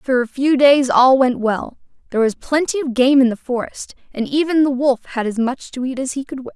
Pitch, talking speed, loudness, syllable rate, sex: 260 Hz, 255 wpm, -17 LUFS, 5.3 syllables/s, female